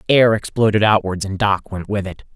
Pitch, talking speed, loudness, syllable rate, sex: 100 Hz, 205 wpm, -18 LUFS, 5.2 syllables/s, male